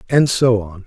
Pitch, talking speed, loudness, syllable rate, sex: 115 Hz, 210 wpm, -16 LUFS, 4.4 syllables/s, male